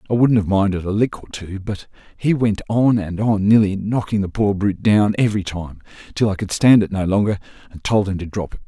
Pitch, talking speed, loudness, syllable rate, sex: 100 Hz, 240 wpm, -18 LUFS, 5.7 syllables/s, male